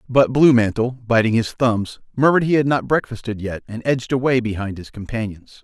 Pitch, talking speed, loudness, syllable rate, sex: 120 Hz, 190 wpm, -19 LUFS, 5.6 syllables/s, male